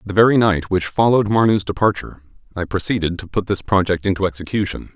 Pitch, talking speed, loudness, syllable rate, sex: 100 Hz, 180 wpm, -18 LUFS, 6.4 syllables/s, male